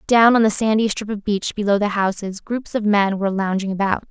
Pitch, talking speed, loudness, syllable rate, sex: 205 Hz, 235 wpm, -19 LUFS, 5.6 syllables/s, female